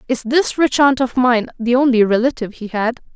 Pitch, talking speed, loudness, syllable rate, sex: 245 Hz, 210 wpm, -16 LUFS, 5.6 syllables/s, female